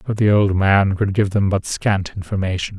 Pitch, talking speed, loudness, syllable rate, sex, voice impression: 100 Hz, 215 wpm, -18 LUFS, 5.0 syllables/s, male, masculine, middle-aged, fluent, raspy, slightly refreshing, calm, friendly, reassuring, unique, slightly wild, lively, kind